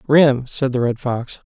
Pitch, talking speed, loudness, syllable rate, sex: 130 Hz, 195 wpm, -18 LUFS, 4.1 syllables/s, male